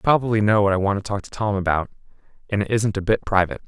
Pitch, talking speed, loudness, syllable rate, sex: 100 Hz, 280 wpm, -21 LUFS, 7.5 syllables/s, male